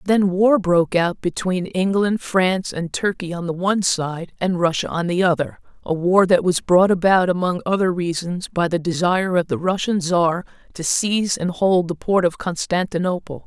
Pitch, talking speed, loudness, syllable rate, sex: 180 Hz, 185 wpm, -19 LUFS, 4.9 syllables/s, female